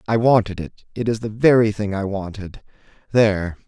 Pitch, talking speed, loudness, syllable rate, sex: 105 Hz, 165 wpm, -19 LUFS, 5.5 syllables/s, male